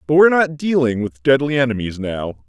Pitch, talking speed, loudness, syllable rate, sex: 130 Hz, 195 wpm, -17 LUFS, 5.6 syllables/s, male